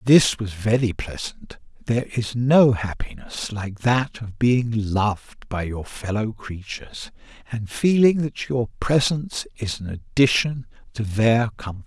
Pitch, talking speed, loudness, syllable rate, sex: 115 Hz, 140 wpm, -22 LUFS, 4.0 syllables/s, male